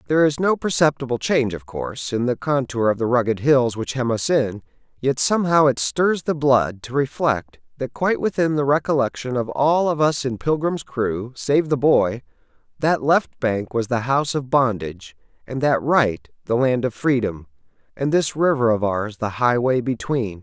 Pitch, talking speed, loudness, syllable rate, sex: 130 Hz, 190 wpm, -20 LUFS, 4.8 syllables/s, male